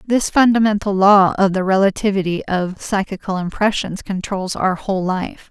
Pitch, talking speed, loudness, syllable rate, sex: 195 Hz, 140 wpm, -17 LUFS, 4.9 syllables/s, female